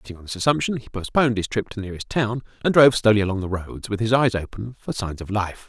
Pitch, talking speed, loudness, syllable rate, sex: 110 Hz, 275 wpm, -22 LUFS, 6.9 syllables/s, male